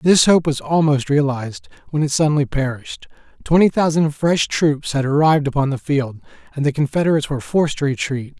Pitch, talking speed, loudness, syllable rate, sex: 145 Hz, 180 wpm, -18 LUFS, 6.0 syllables/s, male